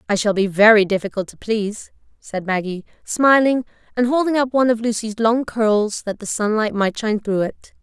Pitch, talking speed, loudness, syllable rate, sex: 220 Hz, 190 wpm, -19 LUFS, 5.3 syllables/s, female